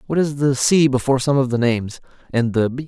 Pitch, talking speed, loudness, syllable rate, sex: 130 Hz, 250 wpm, -18 LUFS, 6.3 syllables/s, male